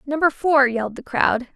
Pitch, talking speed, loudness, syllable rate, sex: 265 Hz, 195 wpm, -19 LUFS, 4.9 syllables/s, female